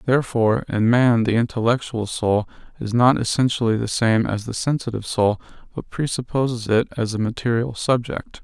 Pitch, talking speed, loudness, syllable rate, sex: 115 Hz, 155 wpm, -21 LUFS, 5.2 syllables/s, male